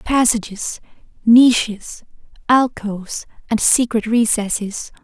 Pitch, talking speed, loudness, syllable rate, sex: 225 Hz, 70 wpm, -17 LUFS, 3.7 syllables/s, female